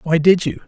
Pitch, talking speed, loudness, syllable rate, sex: 165 Hz, 265 wpm, -16 LUFS, 5.6 syllables/s, male